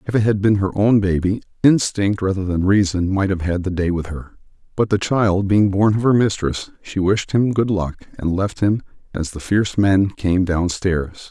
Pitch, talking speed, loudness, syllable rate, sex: 95 Hz, 210 wpm, -19 LUFS, 4.8 syllables/s, male